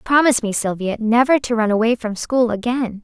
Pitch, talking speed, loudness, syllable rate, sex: 230 Hz, 200 wpm, -18 LUFS, 5.5 syllables/s, female